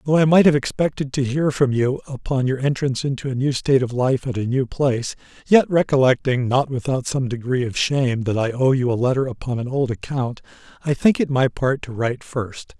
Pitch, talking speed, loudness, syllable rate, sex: 130 Hz, 225 wpm, -20 LUFS, 5.1 syllables/s, male